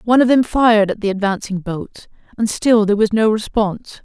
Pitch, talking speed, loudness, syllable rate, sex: 215 Hz, 210 wpm, -16 LUFS, 5.8 syllables/s, female